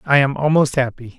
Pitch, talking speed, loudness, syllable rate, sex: 135 Hz, 200 wpm, -17 LUFS, 5.6 syllables/s, male